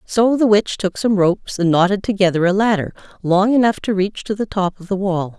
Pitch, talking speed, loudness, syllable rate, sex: 195 Hz, 235 wpm, -17 LUFS, 5.4 syllables/s, female